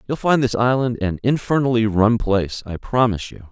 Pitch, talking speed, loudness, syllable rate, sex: 115 Hz, 190 wpm, -19 LUFS, 5.5 syllables/s, male